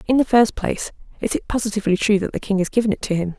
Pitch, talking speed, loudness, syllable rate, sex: 210 Hz, 285 wpm, -20 LUFS, 7.4 syllables/s, female